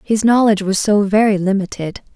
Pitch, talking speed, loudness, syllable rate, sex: 205 Hz, 165 wpm, -15 LUFS, 5.6 syllables/s, female